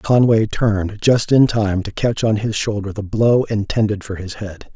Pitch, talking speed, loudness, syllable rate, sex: 105 Hz, 200 wpm, -18 LUFS, 4.5 syllables/s, male